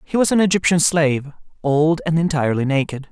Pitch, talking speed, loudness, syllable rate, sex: 155 Hz, 175 wpm, -18 LUFS, 5.9 syllables/s, male